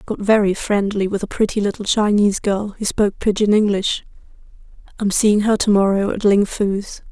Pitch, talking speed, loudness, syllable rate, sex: 205 Hz, 175 wpm, -18 LUFS, 5.3 syllables/s, female